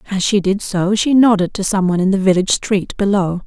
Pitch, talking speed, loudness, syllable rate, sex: 195 Hz, 225 wpm, -15 LUFS, 5.9 syllables/s, female